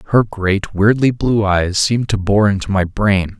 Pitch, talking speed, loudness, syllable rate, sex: 105 Hz, 195 wpm, -15 LUFS, 4.5 syllables/s, male